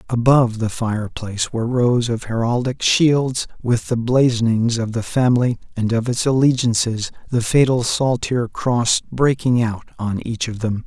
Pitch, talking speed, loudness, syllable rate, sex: 120 Hz, 155 wpm, -19 LUFS, 4.6 syllables/s, male